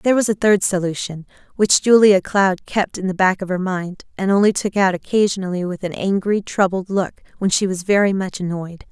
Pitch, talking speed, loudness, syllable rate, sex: 190 Hz, 210 wpm, -18 LUFS, 5.3 syllables/s, female